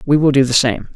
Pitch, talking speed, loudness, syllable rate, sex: 135 Hz, 315 wpm, -14 LUFS, 6.3 syllables/s, male